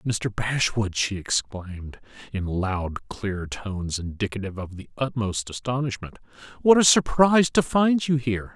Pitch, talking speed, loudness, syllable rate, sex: 115 Hz, 140 wpm, -24 LUFS, 4.6 syllables/s, male